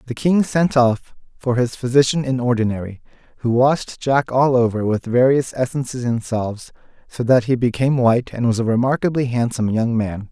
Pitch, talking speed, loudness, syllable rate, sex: 125 Hz, 180 wpm, -18 LUFS, 5.4 syllables/s, male